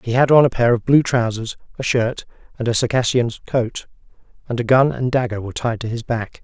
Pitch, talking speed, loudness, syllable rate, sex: 120 Hz, 225 wpm, -19 LUFS, 5.8 syllables/s, male